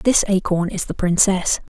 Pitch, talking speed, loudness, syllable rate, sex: 190 Hz, 170 wpm, -19 LUFS, 4.7 syllables/s, female